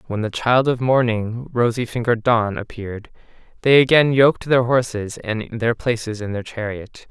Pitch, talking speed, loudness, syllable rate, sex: 115 Hz, 170 wpm, -19 LUFS, 4.9 syllables/s, male